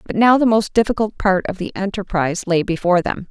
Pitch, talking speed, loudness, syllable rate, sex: 195 Hz, 220 wpm, -18 LUFS, 6.0 syllables/s, female